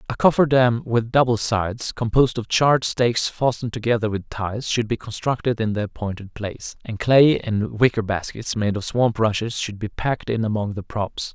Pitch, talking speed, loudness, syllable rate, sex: 115 Hz, 190 wpm, -21 LUFS, 5.3 syllables/s, male